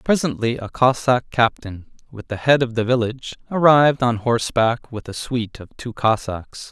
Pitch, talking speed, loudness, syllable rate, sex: 120 Hz, 170 wpm, -19 LUFS, 5.1 syllables/s, male